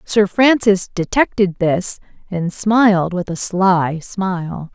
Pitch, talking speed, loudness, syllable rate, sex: 190 Hz, 125 wpm, -16 LUFS, 3.5 syllables/s, female